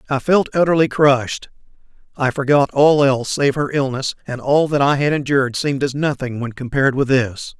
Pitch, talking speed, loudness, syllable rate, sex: 135 Hz, 190 wpm, -17 LUFS, 5.5 syllables/s, male